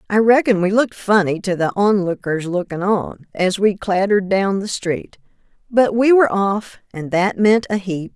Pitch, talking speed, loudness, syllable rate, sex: 200 Hz, 185 wpm, -17 LUFS, 4.7 syllables/s, female